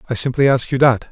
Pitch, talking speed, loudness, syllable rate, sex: 130 Hz, 270 wpm, -16 LUFS, 6.6 syllables/s, male